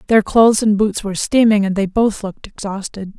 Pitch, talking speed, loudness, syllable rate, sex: 205 Hz, 205 wpm, -15 LUFS, 5.7 syllables/s, female